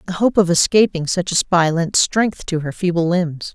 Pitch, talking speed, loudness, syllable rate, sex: 175 Hz, 220 wpm, -17 LUFS, 4.7 syllables/s, female